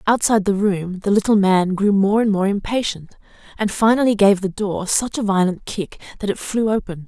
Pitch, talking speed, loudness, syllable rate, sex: 200 Hz, 205 wpm, -18 LUFS, 5.2 syllables/s, female